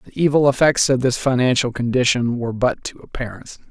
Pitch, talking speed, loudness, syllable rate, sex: 125 Hz, 180 wpm, -18 LUFS, 5.8 syllables/s, male